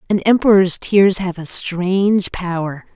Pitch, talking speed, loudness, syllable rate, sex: 185 Hz, 140 wpm, -16 LUFS, 4.1 syllables/s, female